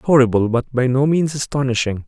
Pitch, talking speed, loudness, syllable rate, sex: 130 Hz, 175 wpm, -18 LUFS, 5.4 syllables/s, male